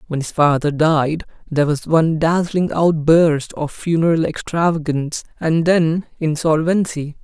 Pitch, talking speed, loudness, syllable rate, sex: 160 Hz, 125 wpm, -17 LUFS, 4.5 syllables/s, male